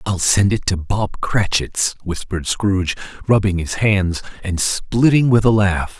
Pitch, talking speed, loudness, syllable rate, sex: 100 Hz, 160 wpm, -18 LUFS, 4.2 syllables/s, male